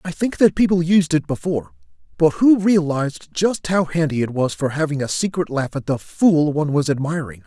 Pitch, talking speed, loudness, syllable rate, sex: 155 Hz, 210 wpm, -19 LUFS, 5.4 syllables/s, male